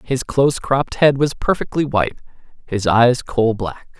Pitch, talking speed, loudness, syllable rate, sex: 130 Hz, 150 wpm, -18 LUFS, 5.4 syllables/s, male